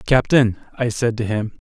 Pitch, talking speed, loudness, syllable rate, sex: 120 Hz, 180 wpm, -19 LUFS, 4.7 syllables/s, male